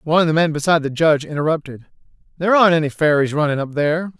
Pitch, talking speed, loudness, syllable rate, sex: 155 Hz, 215 wpm, -17 LUFS, 7.9 syllables/s, male